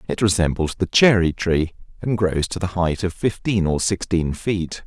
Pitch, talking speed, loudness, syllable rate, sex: 90 Hz, 185 wpm, -20 LUFS, 4.6 syllables/s, male